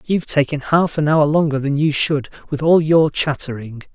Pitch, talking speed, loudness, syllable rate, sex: 150 Hz, 200 wpm, -17 LUFS, 5.1 syllables/s, male